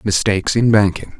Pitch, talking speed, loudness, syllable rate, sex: 100 Hz, 150 wpm, -15 LUFS, 5.6 syllables/s, male